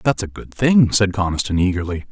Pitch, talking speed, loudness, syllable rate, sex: 100 Hz, 200 wpm, -18 LUFS, 5.6 syllables/s, male